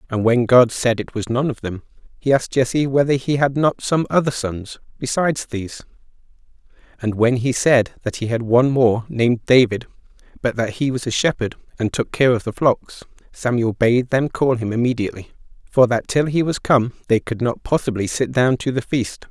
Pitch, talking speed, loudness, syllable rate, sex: 125 Hz, 200 wpm, -19 LUFS, 5.3 syllables/s, male